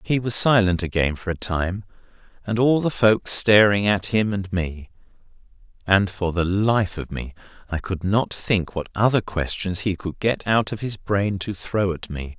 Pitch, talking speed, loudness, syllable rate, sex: 100 Hz, 195 wpm, -22 LUFS, 4.4 syllables/s, male